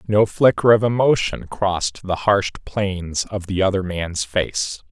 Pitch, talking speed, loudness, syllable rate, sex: 100 Hz, 160 wpm, -20 LUFS, 4.2 syllables/s, male